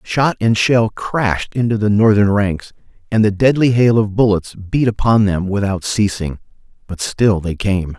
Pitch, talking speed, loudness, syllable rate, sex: 105 Hz, 175 wpm, -16 LUFS, 4.4 syllables/s, male